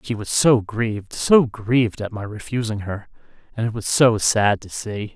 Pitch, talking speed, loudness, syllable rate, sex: 110 Hz, 210 wpm, -20 LUFS, 4.9 syllables/s, male